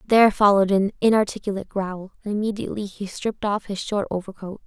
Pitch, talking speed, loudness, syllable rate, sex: 200 Hz, 165 wpm, -22 LUFS, 6.5 syllables/s, female